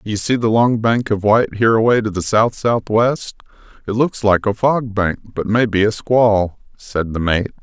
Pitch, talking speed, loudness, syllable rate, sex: 110 Hz, 215 wpm, -16 LUFS, 4.6 syllables/s, male